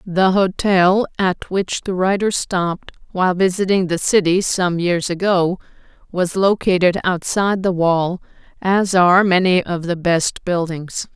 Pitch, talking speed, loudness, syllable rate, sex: 180 Hz, 140 wpm, -17 LUFS, 4.2 syllables/s, female